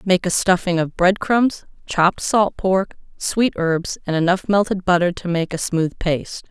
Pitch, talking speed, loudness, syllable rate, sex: 180 Hz, 185 wpm, -19 LUFS, 4.4 syllables/s, female